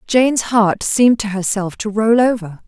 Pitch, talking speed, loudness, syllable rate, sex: 215 Hz, 180 wpm, -16 LUFS, 4.8 syllables/s, female